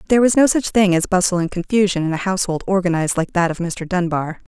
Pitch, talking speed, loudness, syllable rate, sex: 185 Hz, 235 wpm, -18 LUFS, 6.7 syllables/s, female